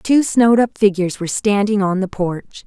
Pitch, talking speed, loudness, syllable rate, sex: 205 Hz, 205 wpm, -16 LUFS, 5.3 syllables/s, female